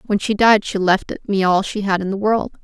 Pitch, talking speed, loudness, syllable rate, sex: 200 Hz, 275 wpm, -17 LUFS, 5.1 syllables/s, female